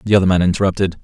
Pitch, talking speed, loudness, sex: 95 Hz, 230 wpm, -15 LUFS, male